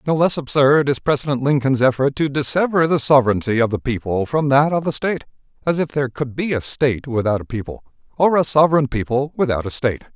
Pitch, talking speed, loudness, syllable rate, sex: 135 Hz, 215 wpm, -18 LUFS, 6.2 syllables/s, male